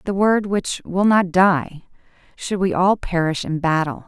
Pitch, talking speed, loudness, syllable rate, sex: 180 Hz, 175 wpm, -19 LUFS, 4.1 syllables/s, female